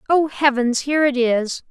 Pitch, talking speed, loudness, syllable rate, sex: 265 Hz, 175 wpm, -18 LUFS, 4.8 syllables/s, female